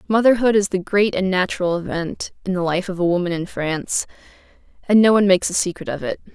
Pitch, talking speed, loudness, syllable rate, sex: 185 Hz, 215 wpm, -19 LUFS, 6.4 syllables/s, female